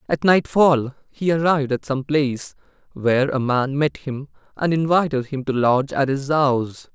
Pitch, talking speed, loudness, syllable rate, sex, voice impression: 140 Hz, 175 wpm, -20 LUFS, 4.9 syllables/s, male, very masculine, adult-like, slightly middle-aged, thick, slightly relaxed, slightly weak, slightly dark, slightly soft, clear, fluent, slightly cool, intellectual, slightly refreshing, sincere, calm, slightly mature, slightly friendly, slightly reassuring, slightly unique, slightly elegant, slightly wild, lively, strict, slightly intense, slightly light